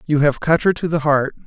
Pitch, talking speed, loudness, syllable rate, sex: 150 Hz, 285 wpm, -17 LUFS, 5.7 syllables/s, male